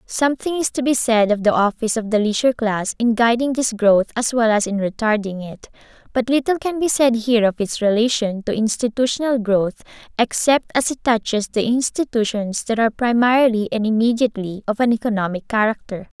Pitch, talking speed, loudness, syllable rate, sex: 230 Hz, 180 wpm, -19 LUFS, 5.6 syllables/s, female